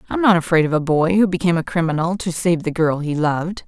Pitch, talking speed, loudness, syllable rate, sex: 170 Hz, 260 wpm, -18 LUFS, 6.3 syllables/s, female